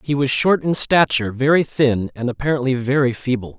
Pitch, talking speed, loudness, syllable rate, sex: 130 Hz, 185 wpm, -18 LUFS, 5.5 syllables/s, male